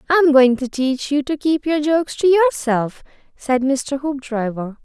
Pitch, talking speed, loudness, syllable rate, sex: 280 Hz, 175 wpm, -18 LUFS, 4.2 syllables/s, female